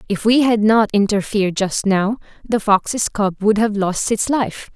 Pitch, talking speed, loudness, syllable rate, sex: 210 Hz, 190 wpm, -17 LUFS, 4.3 syllables/s, female